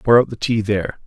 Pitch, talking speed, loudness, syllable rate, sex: 110 Hz, 280 wpm, -18 LUFS, 6.5 syllables/s, male